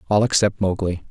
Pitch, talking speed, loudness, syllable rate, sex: 95 Hz, 165 wpm, -20 LUFS, 5.8 syllables/s, male